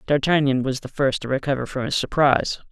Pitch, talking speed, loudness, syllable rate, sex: 135 Hz, 200 wpm, -21 LUFS, 6.0 syllables/s, male